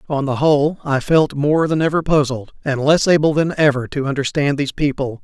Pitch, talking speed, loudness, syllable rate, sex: 145 Hz, 205 wpm, -17 LUFS, 5.6 syllables/s, male